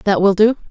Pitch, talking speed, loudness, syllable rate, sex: 200 Hz, 255 wpm, -14 LUFS, 5.4 syllables/s, female